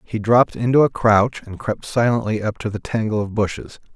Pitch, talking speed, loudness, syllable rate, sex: 110 Hz, 215 wpm, -19 LUFS, 5.4 syllables/s, male